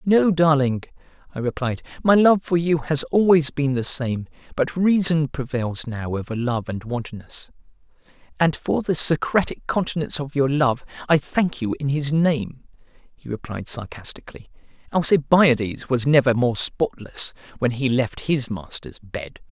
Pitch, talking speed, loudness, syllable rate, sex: 140 Hz, 150 wpm, -21 LUFS, 4.3 syllables/s, male